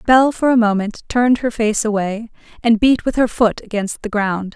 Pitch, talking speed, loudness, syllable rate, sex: 225 Hz, 210 wpm, -17 LUFS, 5.0 syllables/s, female